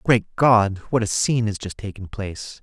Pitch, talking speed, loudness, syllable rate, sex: 105 Hz, 205 wpm, -21 LUFS, 5.1 syllables/s, male